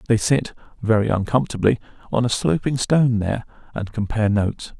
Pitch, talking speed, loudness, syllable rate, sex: 110 Hz, 150 wpm, -21 LUFS, 5.2 syllables/s, male